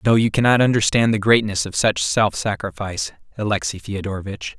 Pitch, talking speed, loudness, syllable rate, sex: 100 Hz, 155 wpm, -19 LUFS, 5.7 syllables/s, male